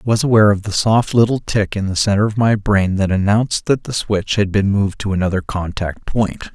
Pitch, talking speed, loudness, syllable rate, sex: 100 Hz, 240 wpm, -17 LUFS, 5.6 syllables/s, male